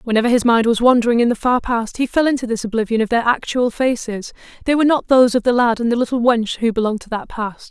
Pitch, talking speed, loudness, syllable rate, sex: 235 Hz, 265 wpm, -17 LUFS, 6.6 syllables/s, female